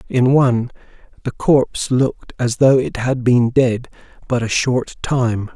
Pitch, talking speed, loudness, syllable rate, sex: 125 Hz, 160 wpm, -17 LUFS, 4.1 syllables/s, male